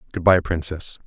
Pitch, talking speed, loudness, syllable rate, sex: 85 Hz, 170 wpm, -20 LUFS, 5.3 syllables/s, male